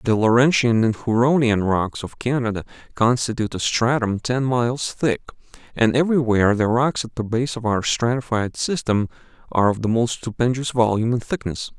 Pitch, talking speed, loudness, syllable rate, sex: 120 Hz, 165 wpm, -20 LUFS, 5.4 syllables/s, male